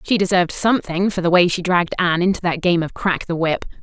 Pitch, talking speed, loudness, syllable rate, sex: 180 Hz, 250 wpm, -18 LUFS, 6.5 syllables/s, female